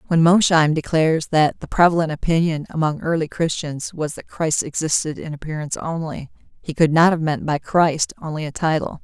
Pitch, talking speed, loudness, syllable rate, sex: 160 Hz, 180 wpm, -20 LUFS, 5.4 syllables/s, female